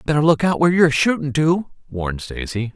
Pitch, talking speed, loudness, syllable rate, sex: 150 Hz, 195 wpm, -18 LUFS, 6.1 syllables/s, male